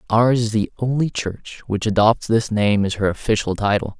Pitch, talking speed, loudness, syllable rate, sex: 110 Hz, 195 wpm, -19 LUFS, 4.9 syllables/s, male